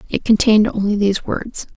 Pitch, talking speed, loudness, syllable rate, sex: 210 Hz, 165 wpm, -16 LUFS, 6.0 syllables/s, female